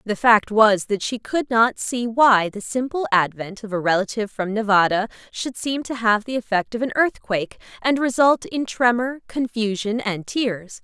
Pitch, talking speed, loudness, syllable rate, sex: 225 Hz, 185 wpm, -21 LUFS, 4.7 syllables/s, female